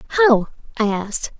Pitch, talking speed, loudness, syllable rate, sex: 240 Hz, 130 wpm, -18 LUFS, 8.0 syllables/s, female